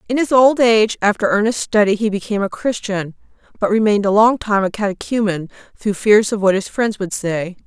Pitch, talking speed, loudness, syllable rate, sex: 210 Hz, 205 wpm, -17 LUFS, 5.7 syllables/s, female